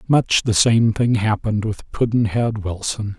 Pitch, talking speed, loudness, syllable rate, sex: 110 Hz, 150 wpm, -19 LUFS, 4.0 syllables/s, male